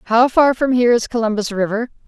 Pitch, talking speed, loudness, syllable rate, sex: 235 Hz, 205 wpm, -16 LUFS, 6.3 syllables/s, female